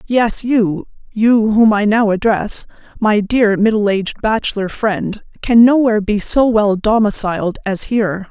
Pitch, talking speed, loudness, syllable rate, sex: 215 Hz, 150 wpm, -14 LUFS, 4.4 syllables/s, female